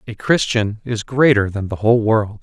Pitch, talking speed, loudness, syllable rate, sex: 110 Hz, 200 wpm, -17 LUFS, 4.9 syllables/s, male